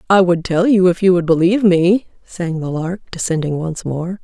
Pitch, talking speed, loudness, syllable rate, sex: 175 Hz, 215 wpm, -16 LUFS, 5.0 syllables/s, female